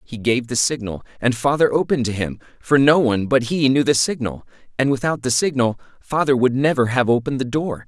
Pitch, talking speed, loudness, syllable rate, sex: 130 Hz, 215 wpm, -19 LUFS, 5.8 syllables/s, male